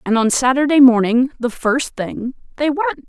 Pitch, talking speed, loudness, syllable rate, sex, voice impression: 260 Hz, 175 wpm, -16 LUFS, 4.5 syllables/s, female, slightly feminine, slightly adult-like, powerful, slightly clear, slightly unique, intense